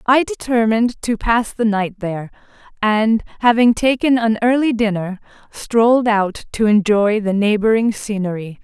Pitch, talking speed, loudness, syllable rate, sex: 220 Hz, 140 wpm, -16 LUFS, 4.6 syllables/s, female